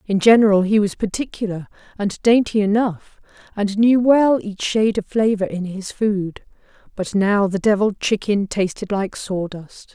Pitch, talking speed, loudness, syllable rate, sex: 205 Hz, 155 wpm, -19 LUFS, 4.6 syllables/s, female